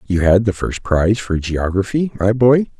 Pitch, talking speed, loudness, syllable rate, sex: 105 Hz, 195 wpm, -16 LUFS, 4.8 syllables/s, male